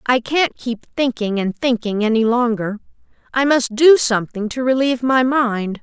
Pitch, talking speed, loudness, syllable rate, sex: 240 Hz, 165 wpm, -17 LUFS, 4.8 syllables/s, female